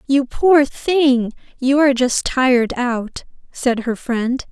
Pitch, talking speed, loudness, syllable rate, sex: 260 Hz, 145 wpm, -17 LUFS, 3.4 syllables/s, female